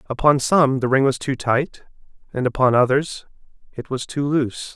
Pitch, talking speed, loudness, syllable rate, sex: 135 Hz, 175 wpm, -19 LUFS, 5.0 syllables/s, male